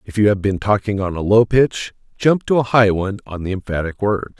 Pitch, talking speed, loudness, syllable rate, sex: 105 Hz, 245 wpm, -18 LUFS, 5.6 syllables/s, male